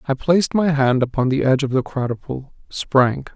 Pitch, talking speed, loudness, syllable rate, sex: 135 Hz, 195 wpm, -19 LUFS, 5.3 syllables/s, male